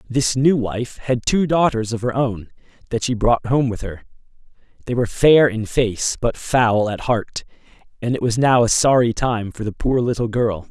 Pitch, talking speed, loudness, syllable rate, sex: 120 Hz, 200 wpm, -19 LUFS, 4.6 syllables/s, male